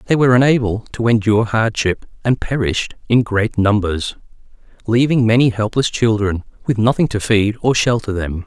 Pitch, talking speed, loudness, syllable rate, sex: 110 Hz, 155 wpm, -16 LUFS, 5.3 syllables/s, male